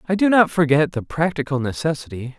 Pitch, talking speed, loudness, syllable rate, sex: 155 Hz, 175 wpm, -19 LUFS, 5.9 syllables/s, male